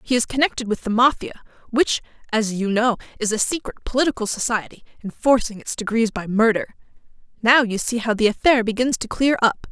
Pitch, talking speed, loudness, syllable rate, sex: 230 Hz, 185 wpm, -20 LUFS, 6.0 syllables/s, female